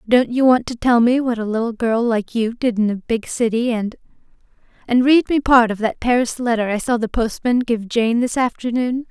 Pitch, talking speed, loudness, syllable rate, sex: 235 Hz, 215 wpm, -18 LUFS, 5.1 syllables/s, female